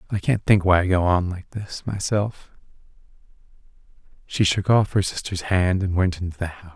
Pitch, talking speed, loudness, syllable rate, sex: 95 Hz, 185 wpm, -22 LUFS, 5.3 syllables/s, male